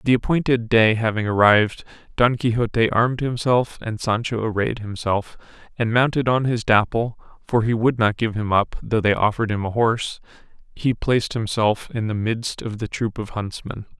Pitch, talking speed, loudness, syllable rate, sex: 115 Hz, 180 wpm, -21 LUFS, 4.0 syllables/s, male